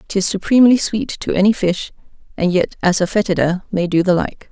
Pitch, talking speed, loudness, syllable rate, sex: 195 Hz, 185 wpm, -16 LUFS, 5.6 syllables/s, female